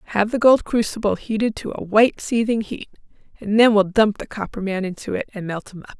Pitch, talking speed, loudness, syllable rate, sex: 210 Hz, 230 wpm, -20 LUFS, 5.8 syllables/s, female